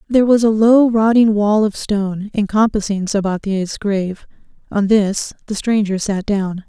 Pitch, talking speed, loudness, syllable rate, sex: 205 Hz, 155 wpm, -16 LUFS, 4.6 syllables/s, female